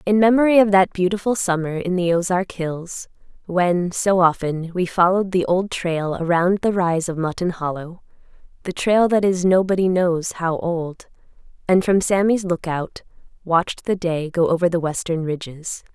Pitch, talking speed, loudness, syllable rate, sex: 180 Hz, 160 wpm, -20 LUFS, 4.7 syllables/s, female